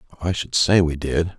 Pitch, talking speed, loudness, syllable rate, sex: 85 Hz, 215 wpm, -20 LUFS, 5.5 syllables/s, male